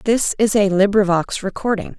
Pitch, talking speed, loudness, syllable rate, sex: 200 Hz, 150 wpm, -17 LUFS, 4.9 syllables/s, female